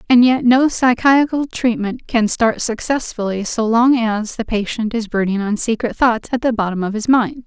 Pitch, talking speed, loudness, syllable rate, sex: 230 Hz, 195 wpm, -17 LUFS, 4.7 syllables/s, female